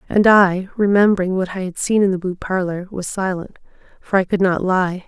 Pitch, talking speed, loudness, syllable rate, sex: 185 Hz, 200 wpm, -18 LUFS, 5.3 syllables/s, female